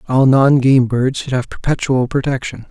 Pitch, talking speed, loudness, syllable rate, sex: 130 Hz, 180 wpm, -15 LUFS, 4.8 syllables/s, male